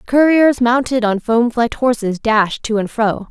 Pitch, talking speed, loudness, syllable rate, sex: 235 Hz, 180 wpm, -15 LUFS, 4.4 syllables/s, female